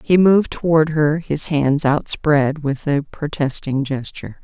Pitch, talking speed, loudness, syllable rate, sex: 150 Hz, 150 wpm, -18 LUFS, 4.2 syllables/s, female